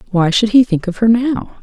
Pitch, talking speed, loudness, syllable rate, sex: 210 Hz, 260 wpm, -14 LUFS, 5.2 syllables/s, female